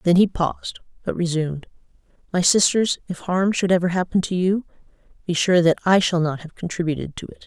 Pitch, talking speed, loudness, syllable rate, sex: 175 Hz, 185 wpm, -21 LUFS, 5.7 syllables/s, female